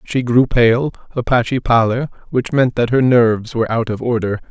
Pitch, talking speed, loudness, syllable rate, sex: 120 Hz, 185 wpm, -16 LUFS, 5.1 syllables/s, male